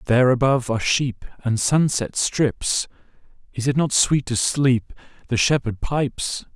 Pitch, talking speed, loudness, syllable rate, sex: 125 Hz, 145 wpm, -21 LUFS, 4.6 syllables/s, male